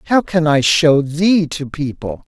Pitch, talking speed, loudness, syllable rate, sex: 155 Hz, 175 wpm, -15 LUFS, 3.8 syllables/s, male